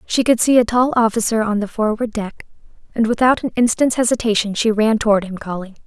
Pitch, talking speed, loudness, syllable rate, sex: 220 Hz, 205 wpm, -17 LUFS, 5.8 syllables/s, female